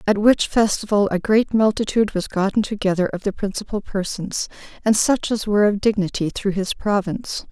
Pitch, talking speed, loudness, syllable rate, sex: 205 Hz, 175 wpm, -20 LUFS, 5.5 syllables/s, female